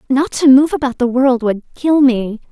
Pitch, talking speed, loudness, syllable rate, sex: 260 Hz, 215 wpm, -14 LUFS, 4.7 syllables/s, female